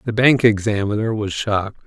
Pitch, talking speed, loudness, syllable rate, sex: 110 Hz, 160 wpm, -18 LUFS, 5.4 syllables/s, male